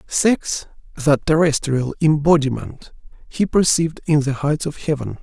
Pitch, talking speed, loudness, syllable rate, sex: 150 Hz, 125 wpm, -19 LUFS, 4.4 syllables/s, male